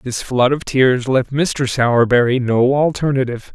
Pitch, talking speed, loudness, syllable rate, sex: 130 Hz, 150 wpm, -16 LUFS, 4.6 syllables/s, male